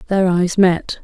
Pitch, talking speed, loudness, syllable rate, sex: 185 Hz, 175 wpm, -15 LUFS, 3.6 syllables/s, female